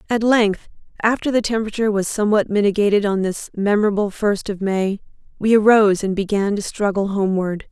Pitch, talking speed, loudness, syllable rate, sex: 205 Hz, 165 wpm, -18 LUFS, 5.9 syllables/s, female